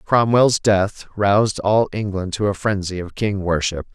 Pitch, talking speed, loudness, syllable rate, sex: 100 Hz, 165 wpm, -19 LUFS, 4.4 syllables/s, male